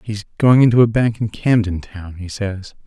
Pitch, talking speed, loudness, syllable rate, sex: 105 Hz, 210 wpm, -16 LUFS, 4.7 syllables/s, male